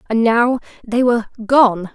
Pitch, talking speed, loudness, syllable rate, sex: 230 Hz, 125 wpm, -16 LUFS, 4.4 syllables/s, female